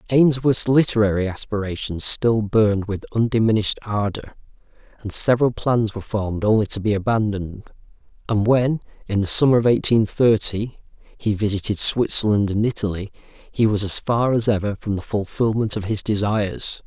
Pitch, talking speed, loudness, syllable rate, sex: 105 Hz, 150 wpm, -20 LUFS, 5.2 syllables/s, male